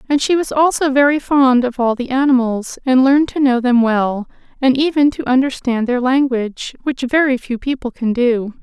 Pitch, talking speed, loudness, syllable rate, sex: 260 Hz, 195 wpm, -15 LUFS, 5.0 syllables/s, female